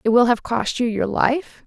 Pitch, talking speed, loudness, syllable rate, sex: 245 Hz, 250 wpm, -20 LUFS, 4.5 syllables/s, female